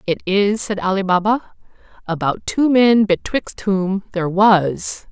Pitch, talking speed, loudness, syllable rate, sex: 195 Hz, 140 wpm, -17 LUFS, 4.1 syllables/s, female